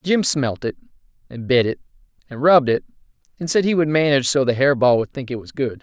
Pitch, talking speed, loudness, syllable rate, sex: 135 Hz, 235 wpm, -19 LUFS, 6.3 syllables/s, male